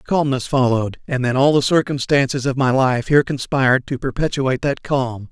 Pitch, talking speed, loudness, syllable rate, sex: 135 Hz, 180 wpm, -18 LUFS, 5.5 syllables/s, male